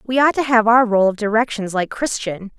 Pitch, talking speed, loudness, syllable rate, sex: 225 Hz, 230 wpm, -17 LUFS, 5.3 syllables/s, female